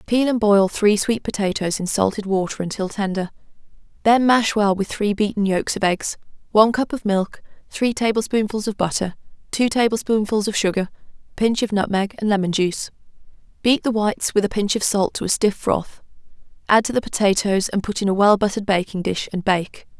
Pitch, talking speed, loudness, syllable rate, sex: 205 Hz, 195 wpm, -20 LUFS, 5.6 syllables/s, female